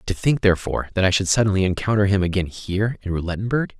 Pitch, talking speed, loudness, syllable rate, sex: 100 Hz, 205 wpm, -21 LUFS, 7.1 syllables/s, male